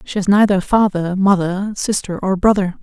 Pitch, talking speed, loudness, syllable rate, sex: 195 Hz, 170 wpm, -16 LUFS, 4.8 syllables/s, female